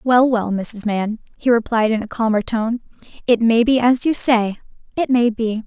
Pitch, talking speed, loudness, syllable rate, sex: 230 Hz, 200 wpm, -18 LUFS, 4.6 syllables/s, female